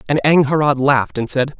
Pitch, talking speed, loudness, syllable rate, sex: 140 Hz, 190 wpm, -15 LUFS, 5.9 syllables/s, male